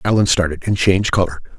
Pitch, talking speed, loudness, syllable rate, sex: 95 Hz, 190 wpm, -17 LUFS, 6.9 syllables/s, male